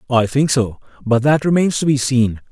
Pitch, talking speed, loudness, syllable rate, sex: 130 Hz, 215 wpm, -16 LUFS, 5.0 syllables/s, male